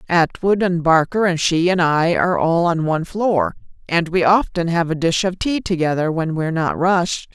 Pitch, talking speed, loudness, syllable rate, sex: 170 Hz, 210 wpm, -18 LUFS, 5.0 syllables/s, female